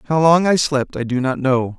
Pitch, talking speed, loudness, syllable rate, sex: 140 Hz, 270 wpm, -17 LUFS, 5.0 syllables/s, male